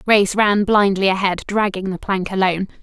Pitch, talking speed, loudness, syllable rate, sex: 195 Hz, 170 wpm, -18 LUFS, 5.5 syllables/s, female